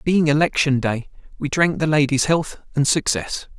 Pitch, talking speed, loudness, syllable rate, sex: 145 Hz, 165 wpm, -20 LUFS, 4.7 syllables/s, male